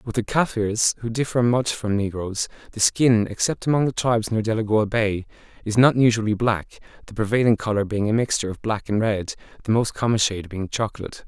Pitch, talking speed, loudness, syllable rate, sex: 110 Hz, 195 wpm, -22 LUFS, 5.8 syllables/s, male